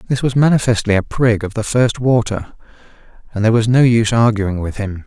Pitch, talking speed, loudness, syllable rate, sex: 115 Hz, 200 wpm, -15 LUFS, 5.9 syllables/s, male